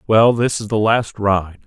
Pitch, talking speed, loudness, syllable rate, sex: 110 Hz, 215 wpm, -17 LUFS, 4.1 syllables/s, male